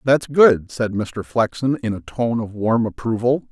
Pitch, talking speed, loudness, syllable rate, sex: 120 Hz, 190 wpm, -19 LUFS, 4.2 syllables/s, male